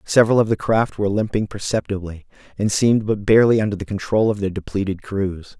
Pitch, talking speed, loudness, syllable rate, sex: 105 Hz, 195 wpm, -19 LUFS, 6.2 syllables/s, male